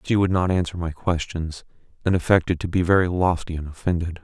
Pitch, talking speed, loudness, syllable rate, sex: 85 Hz, 200 wpm, -23 LUFS, 5.9 syllables/s, male